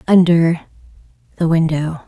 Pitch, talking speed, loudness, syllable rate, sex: 165 Hz, 85 wpm, -16 LUFS, 4.2 syllables/s, female